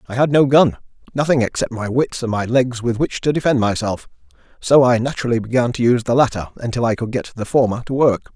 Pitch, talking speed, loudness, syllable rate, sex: 120 Hz, 230 wpm, -18 LUFS, 6.2 syllables/s, male